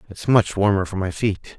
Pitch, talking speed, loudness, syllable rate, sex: 100 Hz, 230 wpm, -20 LUFS, 5.0 syllables/s, male